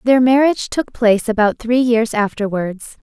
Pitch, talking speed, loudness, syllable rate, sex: 230 Hz, 155 wpm, -16 LUFS, 4.8 syllables/s, female